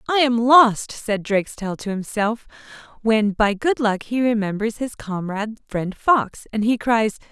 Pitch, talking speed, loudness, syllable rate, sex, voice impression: 220 Hz, 165 wpm, -20 LUFS, 4.3 syllables/s, female, feminine, adult-like, clear, intellectual, slightly friendly, elegant, slightly lively